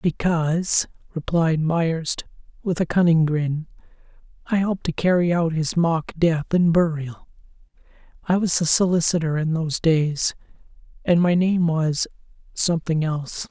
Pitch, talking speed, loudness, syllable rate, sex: 165 Hz, 125 wpm, -21 LUFS, 4.4 syllables/s, male